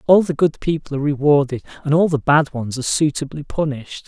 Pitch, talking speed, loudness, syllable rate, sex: 145 Hz, 205 wpm, -18 LUFS, 6.2 syllables/s, male